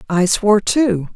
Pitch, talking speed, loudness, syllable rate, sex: 205 Hz, 155 wpm, -15 LUFS, 4.4 syllables/s, female